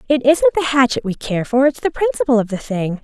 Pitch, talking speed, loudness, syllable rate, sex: 255 Hz, 255 wpm, -17 LUFS, 5.6 syllables/s, female